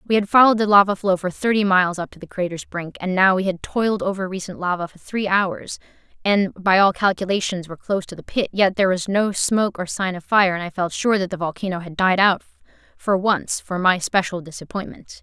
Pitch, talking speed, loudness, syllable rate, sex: 190 Hz, 235 wpm, -20 LUFS, 5.9 syllables/s, female